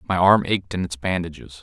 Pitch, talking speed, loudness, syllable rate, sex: 90 Hz, 220 wpm, -21 LUFS, 5.6 syllables/s, male